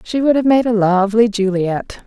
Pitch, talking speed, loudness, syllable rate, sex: 215 Hz, 205 wpm, -15 LUFS, 5.1 syllables/s, female